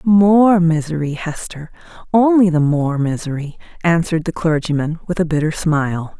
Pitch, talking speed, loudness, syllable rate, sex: 165 Hz, 125 wpm, -16 LUFS, 4.9 syllables/s, female